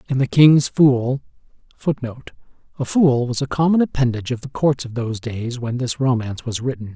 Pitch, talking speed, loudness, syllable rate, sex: 130 Hz, 190 wpm, -19 LUFS, 5.6 syllables/s, male